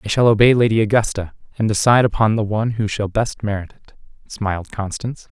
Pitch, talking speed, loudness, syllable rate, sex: 110 Hz, 190 wpm, -18 LUFS, 6.2 syllables/s, male